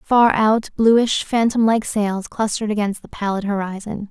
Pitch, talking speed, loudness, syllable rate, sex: 215 Hz, 160 wpm, -19 LUFS, 4.5 syllables/s, female